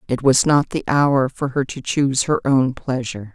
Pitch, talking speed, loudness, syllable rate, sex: 135 Hz, 215 wpm, -19 LUFS, 4.9 syllables/s, female